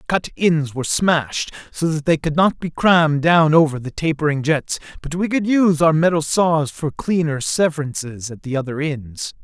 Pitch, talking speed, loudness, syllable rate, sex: 155 Hz, 195 wpm, -18 LUFS, 5.1 syllables/s, male